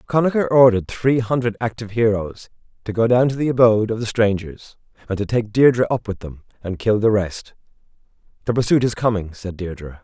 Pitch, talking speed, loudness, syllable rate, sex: 110 Hz, 190 wpm, -19 LUFS, 5.8 syllables/s, male